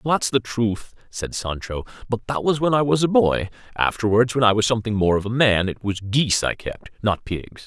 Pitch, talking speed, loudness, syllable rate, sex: 115 Hz, 225 wpm, -21 LUFS, 5.1 syllables/s, male